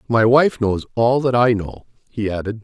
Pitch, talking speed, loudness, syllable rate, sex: 115 Hz, 205 wpm, -17 LUFS, 4.8 syllables/s, male